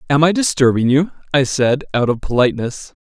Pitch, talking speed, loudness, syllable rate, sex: 135 Hz, 180 wpm, -16 LUFS, 5.7 syllables/s, male